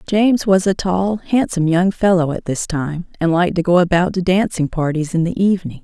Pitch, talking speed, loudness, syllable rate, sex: 180 Hz, 215 wpm, -17 LUFS, 5.6 syllables/s, female